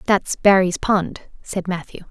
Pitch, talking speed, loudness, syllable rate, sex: 190 Hz, 140 wpm, -19 LUFS, 4.0 syllables/s, female